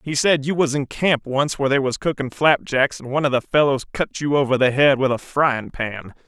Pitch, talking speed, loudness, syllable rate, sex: 135 Hz, 250 wpm, -20 LUFS, 5.3 syllables/s, male